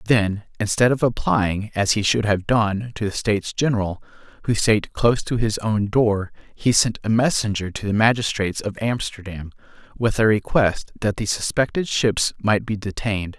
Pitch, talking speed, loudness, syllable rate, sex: 110 Hz, 175 wpm, -21 LUFS, 4.9 syllables/s, male